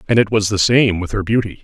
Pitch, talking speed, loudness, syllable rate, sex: 105 Hz, 295 wpm, -16 LUFS, 6.3 syllables/s, male